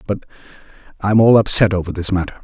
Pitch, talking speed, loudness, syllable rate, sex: 100 Hz, 200 wpm, -15 LUFS, 7.4 syllables/s, male